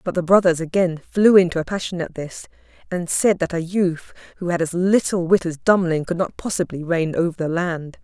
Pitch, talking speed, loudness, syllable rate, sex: 175 Hz, 215 wpm, -20 LUFS, 5.3 syllables/s, female